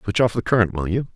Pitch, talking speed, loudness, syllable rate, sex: 105 Hz, 310 wpm, -21 LUFS, 6.6 syllables/s, male